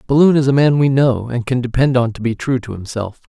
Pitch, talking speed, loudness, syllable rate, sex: 125 Hz, 270 wpm, -16 LUFS, 5.8 syllables/s, male